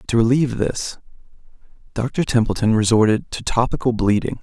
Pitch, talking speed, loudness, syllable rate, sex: 115 Hz, 120 wpm, -19 LUFS, 5.4 syllables/s, male